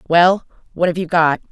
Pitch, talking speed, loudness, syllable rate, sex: 170 Hz, 200 wpm, -16 LUFS, 5.2 syllables/s, female